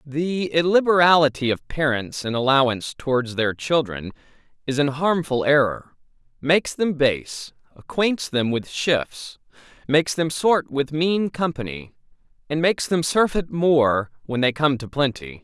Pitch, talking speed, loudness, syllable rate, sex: 145 Hz, 140 wpm, -21 LUFS, 4.4 syllables/s, male